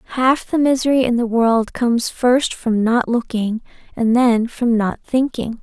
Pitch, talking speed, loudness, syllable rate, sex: 240 Hz, 170 wpm, -17 LUFS, 4.3 syllables/s, female